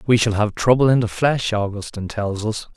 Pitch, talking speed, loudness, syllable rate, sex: 110 Hz, 215 wpm, -19 LUFS, 5.5 syllables/s, male